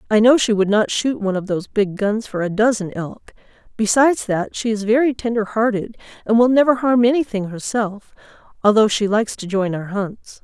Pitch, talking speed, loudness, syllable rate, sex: 215 Hz, 200 wpm, -18 LUFS, 5.5 syllables/s, female